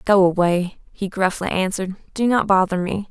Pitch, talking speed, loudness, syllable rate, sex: 190 Hz, 175 wpm, -20 LUFS, 5.1 syllables/s, female